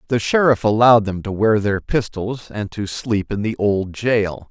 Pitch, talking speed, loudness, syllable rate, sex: 105 Hz, 200 wpm, -18 LUFS, 4.4 syllables/s, male